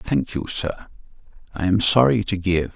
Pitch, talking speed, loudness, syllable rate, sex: 90 Hz, 175 wpm, -21 LUFS, 4.9 syllables/s, male